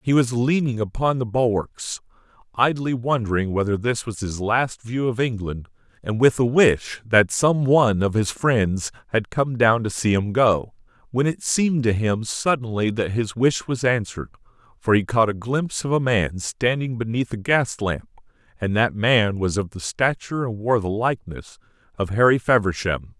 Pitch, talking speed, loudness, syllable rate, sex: 115 Hz, 185 wpm, -21 LUFS, 4.7 syllables/s, male